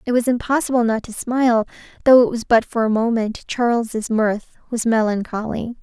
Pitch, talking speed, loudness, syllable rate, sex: 230 Hz, 165 wpm, -19 LUFS, 5.2 syllables/s, female